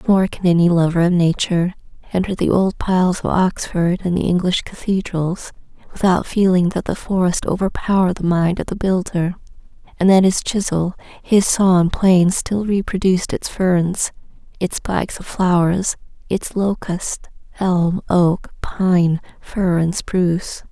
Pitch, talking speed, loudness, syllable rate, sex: 180 Hz, 150 wpm, -18 LUFS, 4.5 syllables/s, female